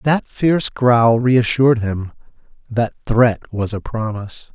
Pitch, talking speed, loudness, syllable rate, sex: 115 Hz, 130 wpm, -17 LUFS, 4.1 syllables/s, male